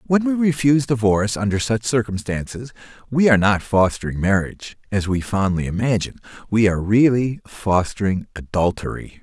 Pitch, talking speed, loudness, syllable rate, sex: 110 Hz, 135 wpm, -19 LUFS, 5.5 syllables/s, male